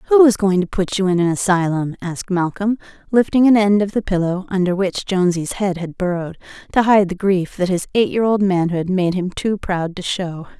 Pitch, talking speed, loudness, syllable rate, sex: 190 Hz, 220 wpm, -18 LUFS, 5.4 syllables/s, female